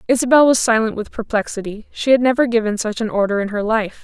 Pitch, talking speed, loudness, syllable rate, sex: 225 Hz, 225 wpm, -17 LUFS, 6.3 syllables/s, female